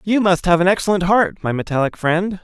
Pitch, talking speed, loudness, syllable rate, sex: 175 Hz, 220 wpm, -17 LUFS, 5.7 syllables/s, male